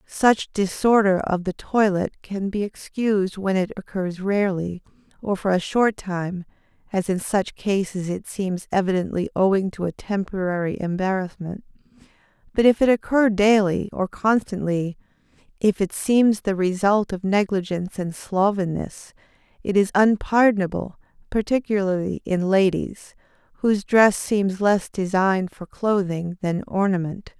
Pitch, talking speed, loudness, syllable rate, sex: 195 Hz, 130 wpm, -22 LUFS, 4.6 syllables/s, female